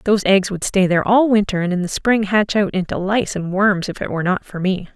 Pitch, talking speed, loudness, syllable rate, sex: 195 Hz, 280 wpm, -18 LUFS, 5.9 syllables/s, female